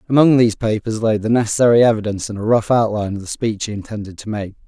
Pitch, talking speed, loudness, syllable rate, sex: 110 Hz, 230 wpm, -17 LUFS, 7.1 syllables/s, male